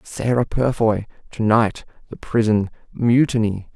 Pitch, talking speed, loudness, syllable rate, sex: 115 Hz, 65 wpm, -20 LUFS, 4.1 syllables/s, male